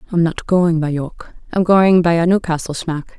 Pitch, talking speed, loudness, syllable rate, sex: 170 Hz, 205 wpm, -16 LUFS, 4.7 syllables/s, female